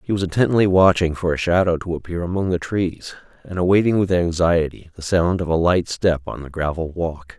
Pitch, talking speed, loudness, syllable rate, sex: 85 Hz, 210 wpm, -19 LUFS, 5.4 syllables/s, male